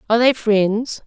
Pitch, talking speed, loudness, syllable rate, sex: 225 Hz, 170 wpm, -17 LUFS, 4.7 syllables/s, female